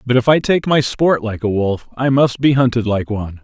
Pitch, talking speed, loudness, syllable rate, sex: 120 Hz, 260 wpm, -16 LUFS, 5.3 syllables/s, male